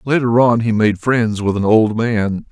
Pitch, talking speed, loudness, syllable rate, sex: 110 Hz, 215 wpm, -15 LUFS, 4.2 syllables/s, male